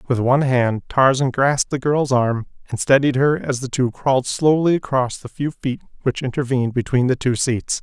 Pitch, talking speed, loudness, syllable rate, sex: 130 Hz, 200 wpm, -19 LUFS, 5.2 syllables/s, male